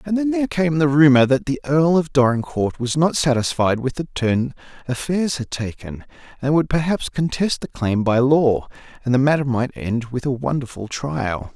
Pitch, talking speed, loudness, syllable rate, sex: 140 Hz, 190 wpm, -20 LUFS, 4.9 syllables/s, male